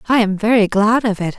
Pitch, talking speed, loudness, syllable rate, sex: 215 Hz, 260 wpm, -15 LUFS, 5.8 syllables/s, female